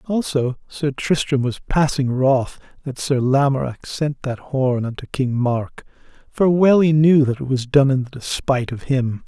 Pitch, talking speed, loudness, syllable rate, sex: 135 Hz, 180 wpm, -19 LUFS, 4.4 syllables/s, male